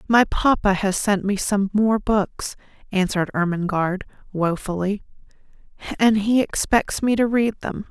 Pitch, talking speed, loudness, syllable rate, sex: 205 Hz, 135 wpm, -21 LUFS, 4.5 syllables/s, female